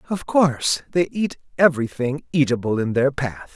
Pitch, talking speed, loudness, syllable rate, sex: 140 Hz, 150 wpm, -21 LUFS, 4.9 syllables/s, male